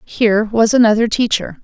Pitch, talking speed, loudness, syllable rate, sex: 220 Hz, 145 wpm, -14 LUFS, 5.4 syllables/s, female